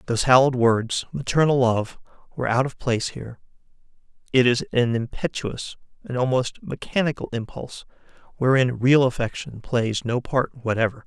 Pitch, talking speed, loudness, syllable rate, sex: 125 Hz, 135 wpm, -22 LUFS, 5.3 syllables/s, male